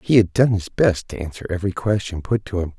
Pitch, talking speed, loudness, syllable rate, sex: 100 Hz, 260 wpm, -21 LUFS, 6.1 syllables/s, male